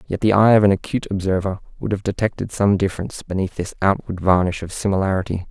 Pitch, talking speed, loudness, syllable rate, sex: 95 Hz, 195 wpm, -20 LUFS, 6.7 syllables/s, male